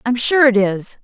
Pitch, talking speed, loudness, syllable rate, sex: 235 Hz, 230 wpm, -15 LUFS, 4.4 syllables/s, female